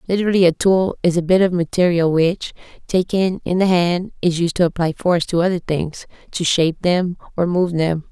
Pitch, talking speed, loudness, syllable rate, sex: 175 Hz, 200 wpm, -18 LUFS, 5.3 syllables/s, female